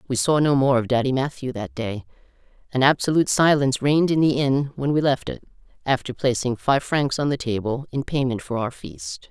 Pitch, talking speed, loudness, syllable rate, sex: 135 Hz, 205 wpm, -22 LUFS, 5.6 syllables/s, female